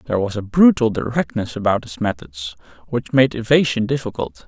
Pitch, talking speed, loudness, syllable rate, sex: 120 Hz, 160 wpm, -19 LUFS, 5.6 syllables/s, male